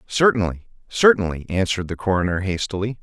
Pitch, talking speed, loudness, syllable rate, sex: 100 Hz, 100 wpm, -20 LUFS, 5.9 syllables/s, male